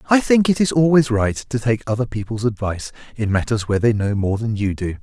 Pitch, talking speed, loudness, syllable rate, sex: 115 Hz, 240 wpm, -19 LUFS, 5.8 syllables/s, male